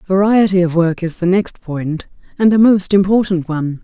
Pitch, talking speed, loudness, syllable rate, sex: 185 Hz, 190 wpm, -14 LUFS, 5.0 syllables/s, female